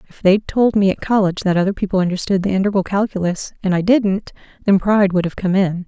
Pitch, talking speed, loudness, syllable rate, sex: 190 Hz, 225 wpm, -17 LUFS, 6.4 syllables/s, female